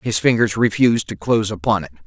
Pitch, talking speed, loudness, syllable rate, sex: 105 Hz, 205 wpm, -18 LUFS, 6.3 syllables/s, male